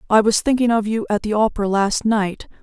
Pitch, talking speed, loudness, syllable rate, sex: 215 Hz, 230 wpm, -19 LUFS, 5.7 syllables/s, female